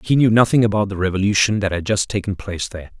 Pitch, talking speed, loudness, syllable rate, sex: 100 Hz, 240 wpm, -18 LUFS, 7.0 syllables/s, male